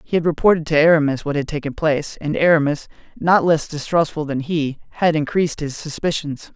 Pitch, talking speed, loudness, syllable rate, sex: 155 Hz, 185 wpm, -19 LUFS, 5.7 syllables/s, male